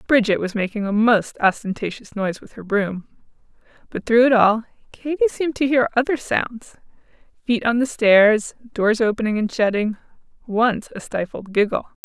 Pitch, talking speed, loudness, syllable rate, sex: 220 Hz, 150 wpm, -20 LUFS, 4.9 syllables/s, female